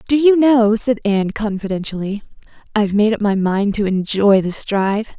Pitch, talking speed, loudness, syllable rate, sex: 210 Hz, 175 wpm, -17 LUFS, 5.2 syllables/s, female